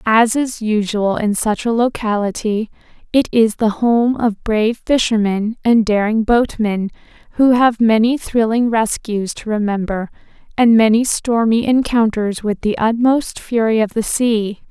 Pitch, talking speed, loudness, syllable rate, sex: 225 Hz, 145 wpm, -16 LUFS, 4.2 syllables/s, female